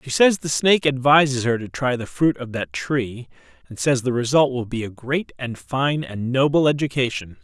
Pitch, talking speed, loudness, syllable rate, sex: 130 Hz, 210 wpm, -21 LUFS, 5.0 syllables/s, male